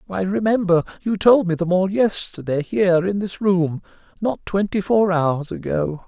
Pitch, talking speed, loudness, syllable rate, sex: 185 Hz, 160 wpm, -20 LUFS, 4.5 syllables/s, male